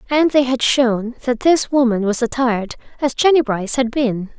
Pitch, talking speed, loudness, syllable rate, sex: 250 Hz, 190 wpm, -17 LUFS, 5.0 syllables/s, female